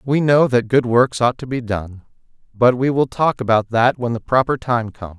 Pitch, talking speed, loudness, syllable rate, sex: 120 Hz, 230 wpm, -17 LUFS, 4.9 syllables/s, male